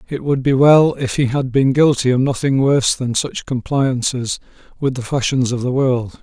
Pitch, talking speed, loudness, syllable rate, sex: 130 Hz, 205 wpm, -16 LUFS, 4.8 syllables/s, male